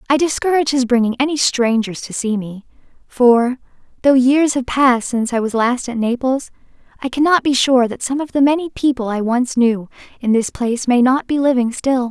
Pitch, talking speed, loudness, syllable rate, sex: 250 Hz, 205 wpm, -16 LUFS, 5.4 syllables/s, female